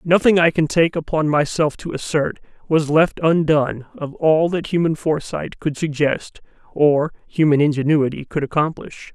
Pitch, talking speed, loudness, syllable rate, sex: 155 Hz, 150 wpm, -19 LUFS, 4.8 syllables/s, male